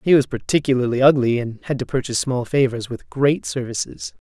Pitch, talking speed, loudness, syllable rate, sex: 130 Hz, 180 wpm, -20 LUFS, 5.8 syllables/s, male